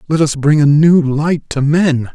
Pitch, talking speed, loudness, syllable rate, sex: 150 Hz, 225 wpm, -12 LUFS, 4.1 syllables/s, male